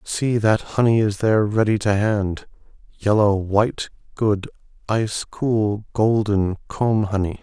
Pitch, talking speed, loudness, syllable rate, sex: 105 Hz, 135 wpm, -20 LUFS, 4.3 syllables/s, male